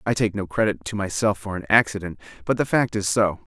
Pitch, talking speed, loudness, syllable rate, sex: 100 Hz, 235 wpm, -22 LUFS, 6.1 syllables/s, male